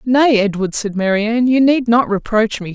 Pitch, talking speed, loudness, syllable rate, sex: 225 Hz, 195 wpm, -15 LUFS, 4.8 syllables/s, female